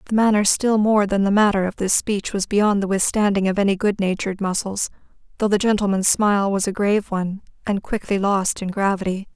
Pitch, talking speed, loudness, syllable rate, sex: 200 Hz, 200 wpm, -20 LUFS, 5.7 syllables/s, female